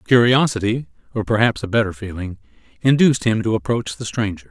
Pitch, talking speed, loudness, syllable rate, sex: 110 Hz, 160 wpm, -19 LUFS, 5.8 syllables/s, male